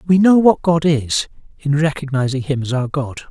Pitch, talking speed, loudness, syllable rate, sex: 150 Hz, 200 wpm, -17 LUFS, 5.0 syllables/s, male